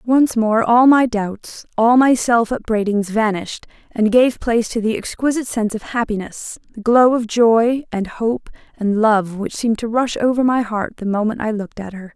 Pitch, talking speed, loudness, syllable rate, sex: 225 Hz, 200 wpm, -17 LUFS, 5.0 syllables/s, female